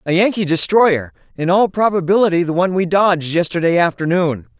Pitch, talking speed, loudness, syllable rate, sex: 180 Hz, 145 wpm, -15 LUFS, 5.8 syllables/s, female